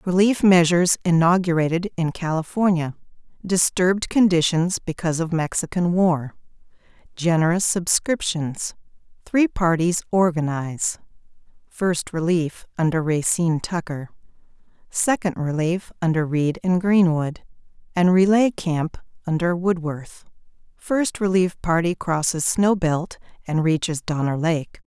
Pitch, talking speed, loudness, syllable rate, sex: 170 Hz, 90 wpm, -21 LUFS, 4.4 syllables/s, female